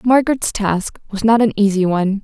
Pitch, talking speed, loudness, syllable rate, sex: 210 Hz, 190 wpm, -16 LUFS, 5.5 syllables/s, female